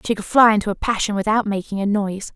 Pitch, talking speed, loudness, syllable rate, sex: 205 Hz, 255 wpm, -19 LUFS, 6.9 syllables/s, female